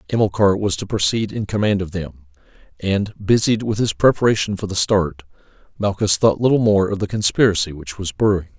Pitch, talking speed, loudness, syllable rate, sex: 100 Hz, 180 wpm, -19 LUFS, 5.6 syllables/s, male